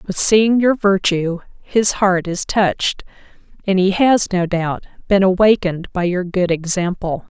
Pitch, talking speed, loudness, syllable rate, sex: 190 Hz, 155 wpm, -17 LUFS, 4.3 syllables/s, female